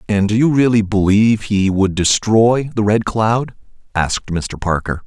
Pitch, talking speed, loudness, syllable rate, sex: 105 Hz, 165 wpm, -15 LUFS, 4.5 syllables/s, male